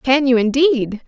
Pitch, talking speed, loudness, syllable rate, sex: 260 Hz, 165 wpm, -15 LUFS, 4.1 syllables/s, female